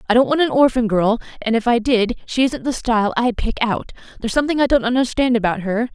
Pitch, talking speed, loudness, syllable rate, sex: 235 Hz, 240 wpm, -18 LUFS, 6.3 syllables/s, female